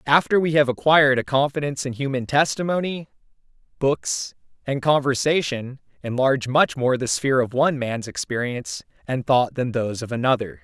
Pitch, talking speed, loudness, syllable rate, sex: 130 Hz, 150 wpm, -21 LUFS, 5.5 syllables/s, male